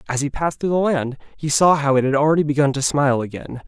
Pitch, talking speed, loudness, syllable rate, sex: 145 Hz, 260 wpm, -19 LUFS, 6.7 syllables/s, male